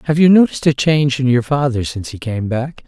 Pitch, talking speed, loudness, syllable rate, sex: 135 Hz, 250 wpm, -15 LUFS, 6.3 syllables/s, male